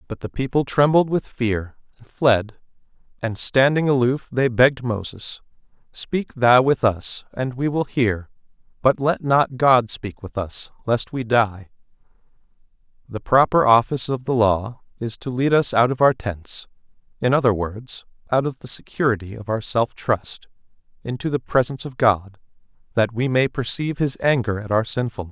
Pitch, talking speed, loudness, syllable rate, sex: 120 Hz, 165 wpm, -21 LUFS, 4.6 syllables/s, male